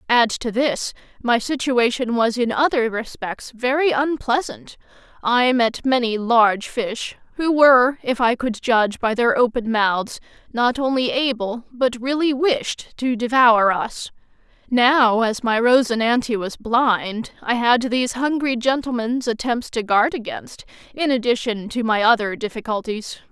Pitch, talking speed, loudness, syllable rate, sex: 240 Hz, 145 wpm, -19 LUFS, 4.2 syllables/s, female